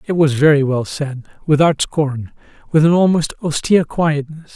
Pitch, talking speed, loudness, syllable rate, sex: 150 Hz, 160 wpm, -16 LUFS, 4.8 syllables/s, male